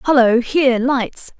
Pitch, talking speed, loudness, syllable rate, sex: 255 Hz, 130 wpm, -16 LUFS, 3.7 syllables/s, female